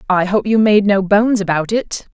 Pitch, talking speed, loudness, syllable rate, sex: 200 Hz, 225 wpm, -14 LUFS, 5.2 syllables/s, female